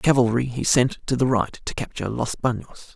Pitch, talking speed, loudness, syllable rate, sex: 120 Hz, 225 wpm, -23 LUFS, 6.2 syllables/s, male